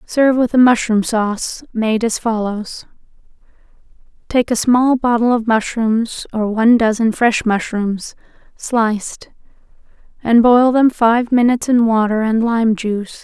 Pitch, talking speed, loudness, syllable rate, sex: 230 Hz, 135 wpm, -15 LUFS, 4.3 syllables/s, female